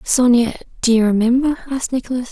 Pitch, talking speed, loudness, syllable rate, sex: 245 Hz, 155 wpm, -17 LUFS, 6.6 syllables/s, female